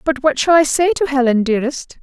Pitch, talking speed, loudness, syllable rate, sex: 280 Hz, 235 wpm, -15 LUFS, 6.2 syllables/s, female